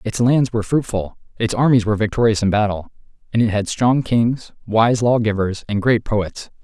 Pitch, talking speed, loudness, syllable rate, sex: 110 Hz, 180 wpm, -18 LUFS, 5.2 syllables/s, male